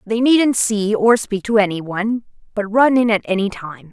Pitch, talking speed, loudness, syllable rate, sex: 215 Hz, 200 wpm, -17 LUFS, 4.6 syllables/s, female